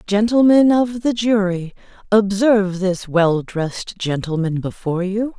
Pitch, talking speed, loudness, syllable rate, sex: 200 Hz, 125 wpm, -18 LUFS, 4.3 syllables/s, female